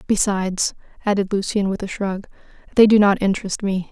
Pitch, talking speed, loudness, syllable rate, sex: 195 Hz, 170 wpm, -19 LUFS, 5.7 syllables/s, female